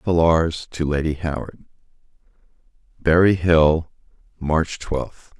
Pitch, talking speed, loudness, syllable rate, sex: 80 Hz, 90 wpm, -20 LUFS, 3.6 syllables/s, male